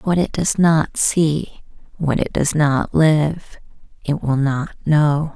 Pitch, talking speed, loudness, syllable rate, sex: 150 Hz, 155 wpm, -18 LUFS, 3.2 syllables/s, female